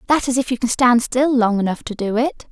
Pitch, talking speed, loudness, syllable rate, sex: 245 Hz, 285 wpm, -18 LUFS, 5.6 syllables/s, female